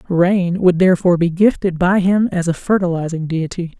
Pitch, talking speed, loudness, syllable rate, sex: 180 Hz, 175 wpm, -16 LUFS, 5.3 syllables/s, female